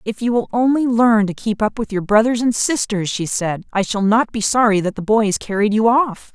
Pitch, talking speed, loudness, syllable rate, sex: 215 Hz, 245 wpm, -17 LUFS, 5.0 syllables/s, female